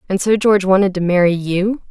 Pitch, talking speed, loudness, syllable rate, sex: 190 Hz, 220 wpm, -15 LUFS, 6.0 syllables/s, female